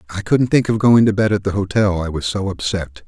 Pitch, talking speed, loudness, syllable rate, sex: 100 Hz, 275 wpm, -17 LUFS, 5.9 syllables/s, male